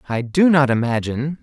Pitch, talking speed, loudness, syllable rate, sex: 135 Hz, 170 wpm, -18 LUFS, 5.7 syllables/s, male